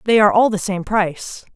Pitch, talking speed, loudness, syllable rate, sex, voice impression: 200 Hz, 230 wpm, -17 LUFS, 6.0 syllables/s, female, very feminine, adult-like, middle-aged, thin, tensed, powerful, slightly dark, very hard, clear, fluent, slightly cool, intellectual, refreshing, slightly sincere, slightly calm, slightly friendly, slightly reassuring, slightly elegant, slightly lively, strict, slightly intense, slightly sharp